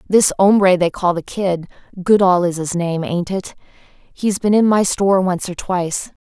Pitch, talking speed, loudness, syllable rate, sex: 185 Hz, 175 wpm, -17 LUFS, 4.8 syllables/s, female